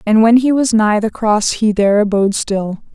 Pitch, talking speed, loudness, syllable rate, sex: 215 Hz, 225 wpm, -14 LUFS, 5.1 syllables/s, female